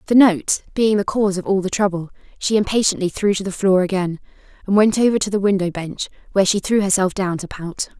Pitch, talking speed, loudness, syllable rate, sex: 195 Hz, 225 wpm, -19 LUFS, 6.0 syllables/s, female